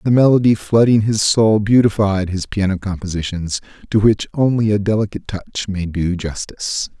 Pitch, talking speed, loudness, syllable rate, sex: 100 Hz, 155 wpm, -17 LUFS, 5.1 syllables/s, male